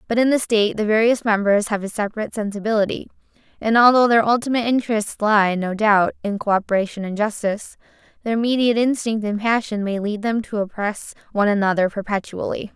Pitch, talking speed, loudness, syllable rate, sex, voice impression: 215 Hz, 170 wpm, -20 LUFS, 6.3 syllables/s, female, feminine, adult-like, tensed, slightly weak, slightly dark, clear, intellectual, calm, lively, slightly sharp, slightly modest